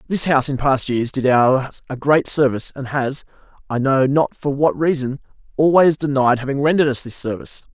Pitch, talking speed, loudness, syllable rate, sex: 135 Hz, 195 wpm, -18 LUFS, 5.5 syllables/s, male